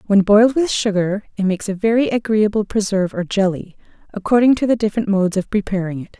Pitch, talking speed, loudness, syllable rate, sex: 205 Hz, 195 wpm, -17 LUFS, 6.5 syllables/s, female